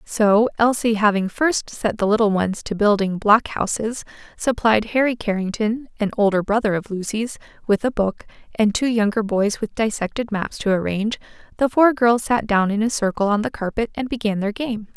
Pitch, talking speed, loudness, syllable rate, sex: 215 Hz, 180 wpm, -20 LUFS, 5.0 syllables/s, female